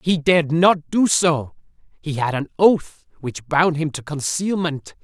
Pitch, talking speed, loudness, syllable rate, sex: 155 Hz, 165 wpm, -19 LUFS, 4.0 syllables/s, male